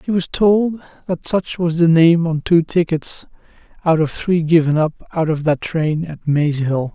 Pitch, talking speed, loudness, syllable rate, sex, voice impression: 165 Hz, 200 wpm, -17 LUFS, 4.2 syllables/s, male, masculine, slightly middle-aged, relaxed, slightly weak, slightly muffled, calm, slightly friendly, modest